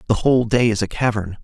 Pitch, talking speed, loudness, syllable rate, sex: 110 Hz, 250 wpm, -18 LUFS, 6.7 syllables/s, male